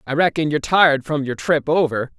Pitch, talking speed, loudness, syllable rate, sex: 145 Hz, 220 wpm, -18 LUFS, 6.0 syllables/s, male